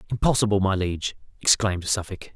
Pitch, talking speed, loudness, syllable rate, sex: 100 Hz, 125 wpm, -23 LUFS, 6.6 syllables/s, male